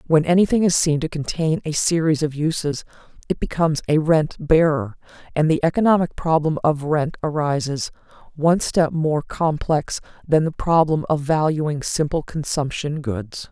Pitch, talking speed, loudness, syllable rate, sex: 155 Hz, 150 wpm, -20 LUFS, 4.7 syllables/s, female